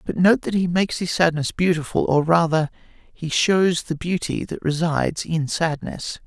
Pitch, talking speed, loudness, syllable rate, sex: 165 Hz, 170 wpm, -21 LUFS, 4.6 syllables/s, male